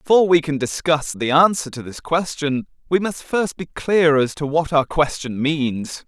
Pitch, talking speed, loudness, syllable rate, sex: 155 Hz, 200 wpm, -19 LUFS, 4.5 syllables/s, male